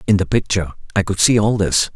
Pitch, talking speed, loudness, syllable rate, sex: 100 Hz, 245 wpm, -17 LUFS, 6.2 syllables/s, male